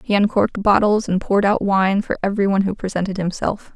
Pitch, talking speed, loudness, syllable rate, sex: 200 Hz, 210 wpm, -19 LUFS, 6.4 syllables/s, female